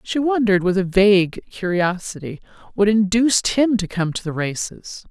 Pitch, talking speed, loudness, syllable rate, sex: 200 Hz, 165 wpm, -19 LUFS, 5.0 syllables/s, female